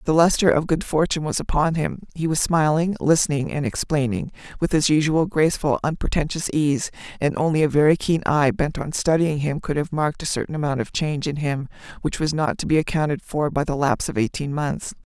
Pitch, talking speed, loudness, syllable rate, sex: 150 Hz, 210 wpm, -22 LUFS, 5.8 syllables/s, female